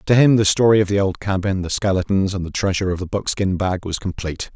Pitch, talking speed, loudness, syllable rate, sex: 95 Hz, 250 wpm, -19 LUFS, 6.4 syllables/s, male